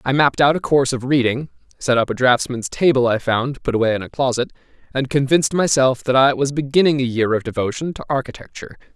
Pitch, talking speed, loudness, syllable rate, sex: 130 Hz, 215 wpm, -18 LUFS, 6.3 syllables/s, male